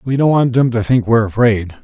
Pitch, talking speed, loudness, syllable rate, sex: 115 Hz, 260 wpm, -14 LUFS, 5.6 syllables/s, male